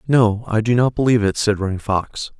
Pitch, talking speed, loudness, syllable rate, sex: 110 Hz, 225 wpm, -18 LUFS, 5.5 syllables/s, male